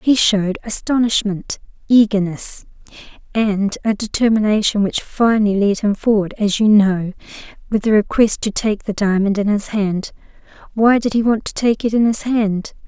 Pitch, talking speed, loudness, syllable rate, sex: 210 Hz, 165 wpm, -17 LUFS, 4.8 syllables/s, female